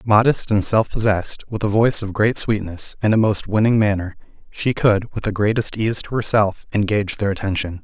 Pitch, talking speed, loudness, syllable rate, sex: 105 Hz, 200 wpm, -19 LUFS, 5.4 syllables/s, male